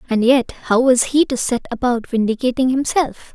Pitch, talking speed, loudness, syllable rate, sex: 250 Hz, 180 wpm, -17 LUFS, 4.8 syllables/s, female